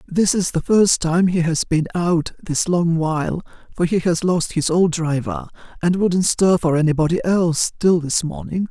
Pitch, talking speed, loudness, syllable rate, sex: 170 Hz, 195 wpm, -18 LUFS, 4.6 syllables/s, male